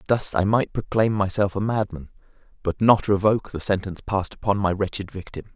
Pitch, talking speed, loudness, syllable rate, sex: 100 Hz, 185 wpm, -23 LUFS, 5.9 syllables/s, male